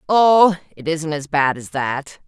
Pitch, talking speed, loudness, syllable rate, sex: 160 Hz, 185 wpm, -18 LUFS, 3.8 syllables/s, female